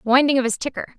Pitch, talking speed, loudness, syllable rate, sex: 260 Hz, 245 wpm, -20 LUFS, 7.6 syllables/s, female